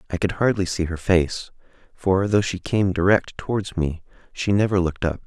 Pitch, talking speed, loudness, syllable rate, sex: 95 Hz, 195 wpm, -22 LUFS, 5.1 syllables/s, male